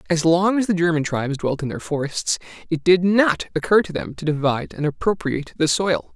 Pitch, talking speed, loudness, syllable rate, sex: 165 Hz, 215 wpm, -20 LUFS, 5.7 syllables/s, male